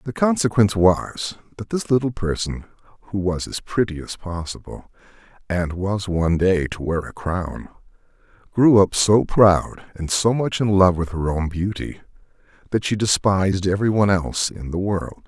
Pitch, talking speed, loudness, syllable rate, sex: 95 Hz, 165 wpm, -20 LUFS, 4.7 syllables/s, male